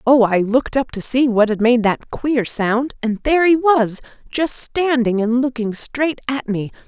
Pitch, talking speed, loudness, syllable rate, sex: 245 Hz, 200 wpm, -18 LUFS, 4.3 syllables/s, female